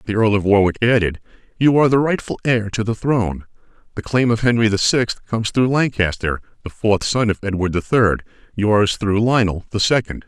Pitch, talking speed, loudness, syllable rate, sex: 110 Hz, 195 wpm, -18 LUFS, 5.4 syllables/s, male